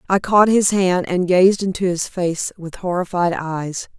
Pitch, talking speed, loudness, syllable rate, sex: 180 Hz, 180 wpm, -18 LUFS, 4.1 syllables/s, female